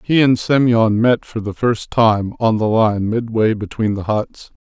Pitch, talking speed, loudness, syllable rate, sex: 110 Hz, 195 wpm, -16 LUFS, 4.1 syllables/s, male